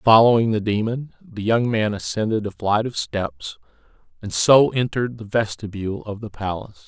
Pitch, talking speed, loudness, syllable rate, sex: 110 Hz, 165 wpm, -21 LUFS, 5.1 syllables/s, male